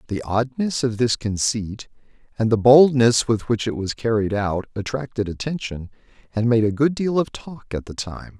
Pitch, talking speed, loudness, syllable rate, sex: 115 Hz, 185 wpm, -21 LUFS, 4.8 syllables/s, male